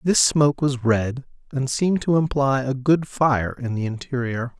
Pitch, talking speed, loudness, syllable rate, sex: 135 Hz, 185 wpm, -21 LUFS, 4.6 syllables/s, male